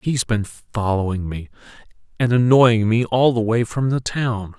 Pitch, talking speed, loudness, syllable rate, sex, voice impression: 115 Hz, 185 wpm, -19 LUFS, 4.5 syllables/s, male, very masculine, very adult-like, old, very thick, slightly tensed, slightly powerful, slightly dark, slightly soft, slightly muffled, fluent, slightly raspy, cool, very intellectual, very sincere, very calm, very mature, friendly, very reassuring, very unique, elegant, wild, sweet, lively, kind, slightly modest